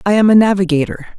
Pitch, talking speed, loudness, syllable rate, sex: 190 Hz, 205 wpm, -13 LUFS, 7.0 syllables/s, female